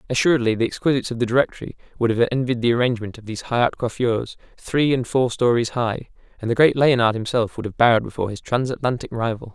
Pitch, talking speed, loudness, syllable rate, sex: 120 Hz, 205 wpm, -21 LUFS, 6.8 syllables/s, male